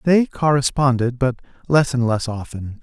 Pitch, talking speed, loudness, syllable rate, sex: 130 Hz, 150 wpm, -19 LUFS, 4.6 syllables/s, male